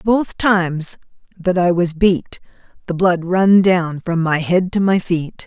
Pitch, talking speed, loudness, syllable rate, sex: 180 Hz, 175 wpm, -16 LUFS, 3.8 syllables/s, female